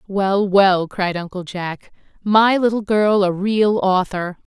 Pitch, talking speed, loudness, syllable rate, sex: 195 Hz, 145 wpm, -18 LUFS, 3.6 syllables/s, female